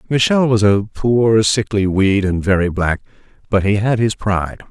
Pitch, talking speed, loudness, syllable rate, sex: 105 Hz, 180 wpm, -16 LUFS, 4.9 syllables/s, male